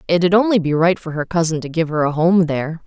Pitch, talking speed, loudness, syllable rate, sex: 165 Hz, 270 wpm, -17 LUFS, 5.9 syllables/s, female